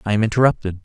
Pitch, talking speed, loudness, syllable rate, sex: 110 Hz, 215 wpm, -17 LUFS, 8.2 syllables/s, male